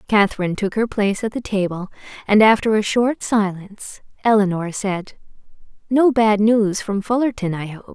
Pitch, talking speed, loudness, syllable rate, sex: 210 Hz, 160 wpm, -18 LUFS, 5.0 syllables/s, female